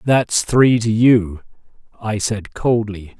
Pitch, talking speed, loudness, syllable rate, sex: 110 Hz, 130 wpm, -16 LUFS, 3.2 syllables/s, male